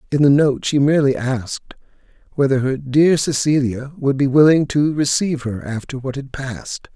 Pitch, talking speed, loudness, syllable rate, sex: 140 Hz, 170 wpm, -17 LUFS, 5.1 syllables/s, male